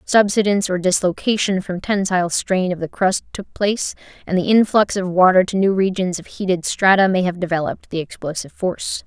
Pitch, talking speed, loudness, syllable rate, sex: 185 Hz, 185 wpm, -18 LUFS, 5.7 syllables/s, female